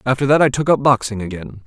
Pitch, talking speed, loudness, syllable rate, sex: 125 Hz, 250 wpm, -16 LUFS, 6.5 syllables/s, male